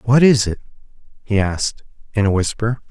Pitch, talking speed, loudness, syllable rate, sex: 110 Hz, 165 wpm, -18 LUFS, 5.6 syllables/s, male